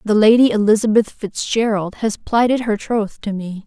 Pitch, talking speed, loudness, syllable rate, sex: 215 Hz, 165 wpm, -17 LUFS, 4.8 syllables/s, female